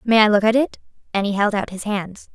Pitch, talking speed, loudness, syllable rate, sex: 210 Hz, 280 wpm, -19 LUFS, 6.2 syllables/s, female